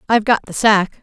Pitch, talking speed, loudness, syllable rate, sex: 210 Hz, 235 wpm, -15 LUFS, 6.5 syllables/s, female